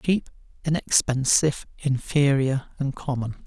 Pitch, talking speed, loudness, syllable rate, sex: 140 Hz, 85 wpm, -24 LUFS, 4.3 syllables/s, male